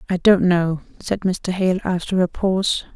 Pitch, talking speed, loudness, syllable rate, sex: 180 Hz, 185 wpm, -20 LUFS, 4.5 syllables/s, female